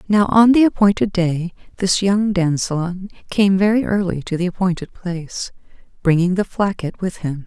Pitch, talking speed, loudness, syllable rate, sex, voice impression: 185 Hz, 160 wpm, -18 LUFS, 4.9 syllables/s, female, feminine, adult-like, slightly intellectual, calm, elegant